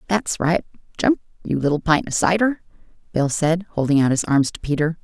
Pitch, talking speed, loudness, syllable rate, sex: 165 Hz, 180 wpm, -20 LUFS, 5.5 syllables/s, female